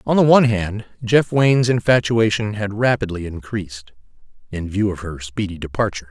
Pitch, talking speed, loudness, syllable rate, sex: 105 Hz, 155 wpm, -19 LUFS, 5.3 syllables/s, male